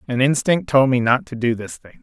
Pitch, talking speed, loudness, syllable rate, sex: 130 Hz, 265 wpm, -18 LUFS, 5.4 syllables/s, male